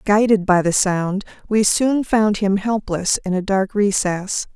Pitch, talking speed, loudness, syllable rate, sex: 200 Hz, 170 wpm, -18 LUFS, 3.9 syllables/s, female